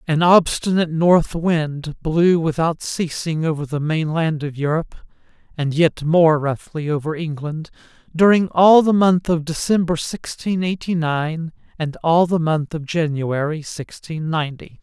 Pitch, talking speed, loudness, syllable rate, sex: 160 Hz, 140 wpm, -19 LUFS, 4.2 syllables/s, male